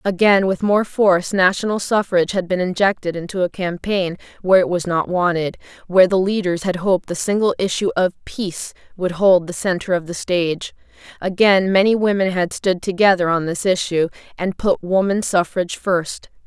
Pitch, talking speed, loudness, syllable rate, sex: 185 Hz, 175 wpm, -18 LUFS, 5.3 syllables/s, female